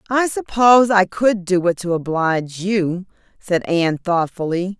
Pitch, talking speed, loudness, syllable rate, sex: 190 Hz, 150 wpm, -18 LUFS, 4.5 syllables/s, female